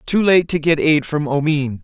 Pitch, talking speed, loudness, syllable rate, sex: 150 Hz, 230 wpm, -16 LUFS, 4.7 syllables/s, male